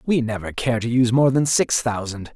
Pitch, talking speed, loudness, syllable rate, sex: 120 Hz, 230 wpm, -20 LUFS, 5.4 syllables/s, male